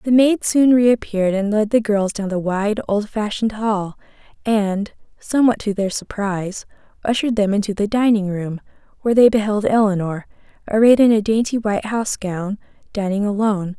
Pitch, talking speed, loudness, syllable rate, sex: 210 Hz, 160 wpm, -18 LUFS, 5.4 syllables/s, female